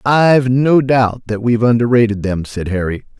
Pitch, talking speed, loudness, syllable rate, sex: 115 Hz, 170 wpm, -14 LUFS, 5.1 syllables/s, male